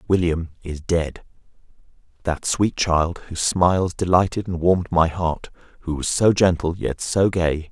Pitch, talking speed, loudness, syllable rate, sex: 85 Hz, 150 wpm, -21 LUFS, 4.4 syllables/s, male